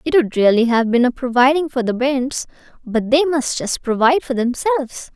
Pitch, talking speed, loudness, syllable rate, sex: 260 Hz, 200 wpm, -17 LUFS, 5.2 syllables/s, female